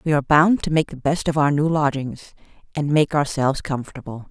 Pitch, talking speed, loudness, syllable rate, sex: 145 Hz, 210 wpm, -20 LUFS, 6.0 syllables/s, female